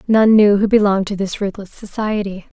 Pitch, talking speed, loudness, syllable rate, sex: 205 Hz, 185 wpm, -16 LUFS, 5.5 syllables/s, female